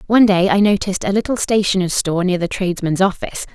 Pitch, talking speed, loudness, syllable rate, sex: 190 Hz, 205 wpm, -17 LUFS, 6.9 syllables/s, female